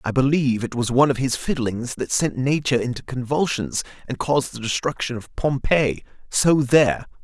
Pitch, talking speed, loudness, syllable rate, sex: 130 Hz, 165 wpm, -21 LUFS, 5.4 syllables/s, male